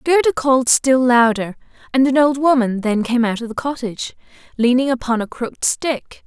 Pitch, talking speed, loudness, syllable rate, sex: 250 Hz, 180 wpm, -17 LUFS, 5.2 syllables/s, female